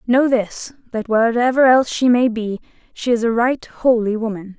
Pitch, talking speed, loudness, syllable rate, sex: 235 Hz, 185 wpm, -17 LUFS, 4.8 syllables/s, female